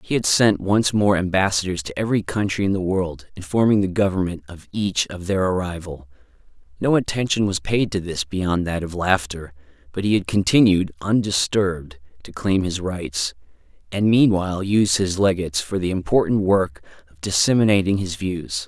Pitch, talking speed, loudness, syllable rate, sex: 95 Hz, 165 wpm, -20 LUFS, 5.1 syllables/s, male